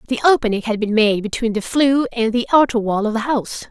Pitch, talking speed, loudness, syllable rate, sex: 230 Hz, 245 wpm, -17 LUFS, 6.0 syllables/s, female